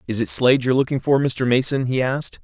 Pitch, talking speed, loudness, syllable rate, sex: 125 Hz, 245 wpm, -19 LUFS, 6.6 syllables/s, male